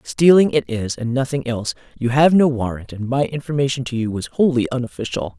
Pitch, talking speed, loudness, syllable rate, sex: 125 Hz, 200 wpm, -19 LUFS, 5.8 syllables/s, female